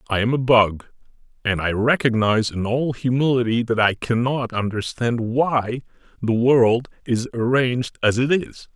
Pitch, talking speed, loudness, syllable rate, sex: 120 Hz, 150 wpm, -20 LUFS, 4.5 syllables/s, male